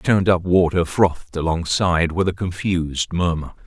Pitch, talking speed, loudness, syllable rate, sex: 85 Hz, 165 wpm, -20 LUFS, 5.4 syllables/s, male